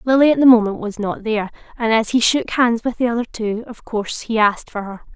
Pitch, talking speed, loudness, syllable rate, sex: 225 Hz, 255 wpm, -18 LUFS, 5.8 syllables/s, female